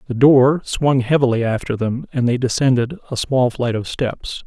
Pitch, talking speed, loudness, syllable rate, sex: 125 Hz, 190 wpm, -18 LUFS, 4.7 syllables/s, male